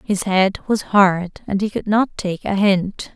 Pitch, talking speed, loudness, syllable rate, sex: 195 Hz, 210 wpm, -18 LUFS, 3.9 syllables/s, female